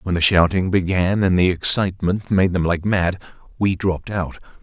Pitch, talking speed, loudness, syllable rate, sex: 90 Hz, 180 wpm, -19 LUFS, 5.1 syllables/s, male